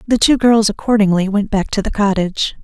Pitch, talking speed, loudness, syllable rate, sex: 205 Hz, 205 wpm, -15 LUFS, 5.8 syllables/s, female